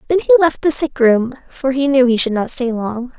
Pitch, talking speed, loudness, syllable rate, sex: 265 Hz, 265 wpm, -15 LUFS, 5.2 syllables/s, female